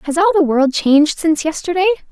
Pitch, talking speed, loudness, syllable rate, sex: 325 Hz, 200 wpm, -15 LUFS, 7.2 syllables/s, female